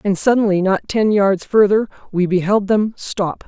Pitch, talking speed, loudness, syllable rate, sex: 200 Hz, 175 wpm, -16 LUFS, 4.5 syllables/s, female